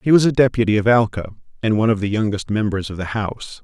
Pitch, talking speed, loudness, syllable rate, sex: 110 Hz, 250 wpm, -19 LUFS, 6.9 syllables/s, male